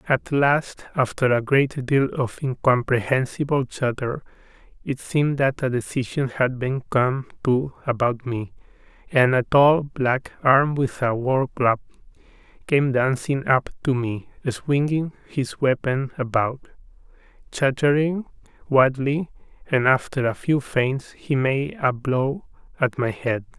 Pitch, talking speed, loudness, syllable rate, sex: 135 Hz, 130 wpm, -22 LUFS, 3.9 syllables/s, male